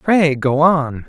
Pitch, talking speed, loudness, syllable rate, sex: 150 Hz, 165 wpm, -15 LUFS, 3.1 syllables/s, male